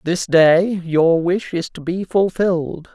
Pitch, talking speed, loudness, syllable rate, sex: 175 Hz, 165 wpm, -17 LUFS, 3.6 syllables/s, male